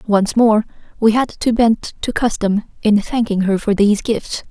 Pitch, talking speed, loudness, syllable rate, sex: 215 Hz, 185 wpm, -16 LUFS, 4.5 syllables/s, female